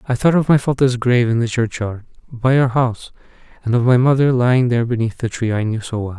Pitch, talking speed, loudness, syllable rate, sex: 120 Hz, 245 wpm, -17 LUFS, 6.3 syllables/s, male